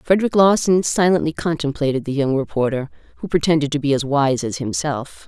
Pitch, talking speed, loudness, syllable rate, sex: 150 Hz, 170 wpm, -19 LUFS, 5.8 syllables/s, female